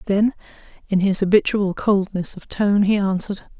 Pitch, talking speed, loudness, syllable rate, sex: 195 Hz, 150 wpm, -20 LUFS, 5.0 syllables/s, female